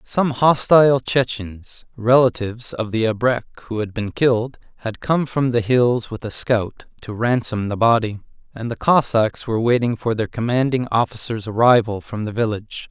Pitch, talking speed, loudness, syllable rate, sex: 115 Hz, 165 wpm, -19 LUFS, 4.9 syllables/s, male